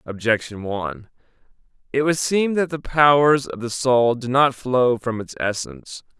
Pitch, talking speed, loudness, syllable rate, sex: 125 Hz, 165 wpm, -20 LUFS, 4.5 syllables/s, male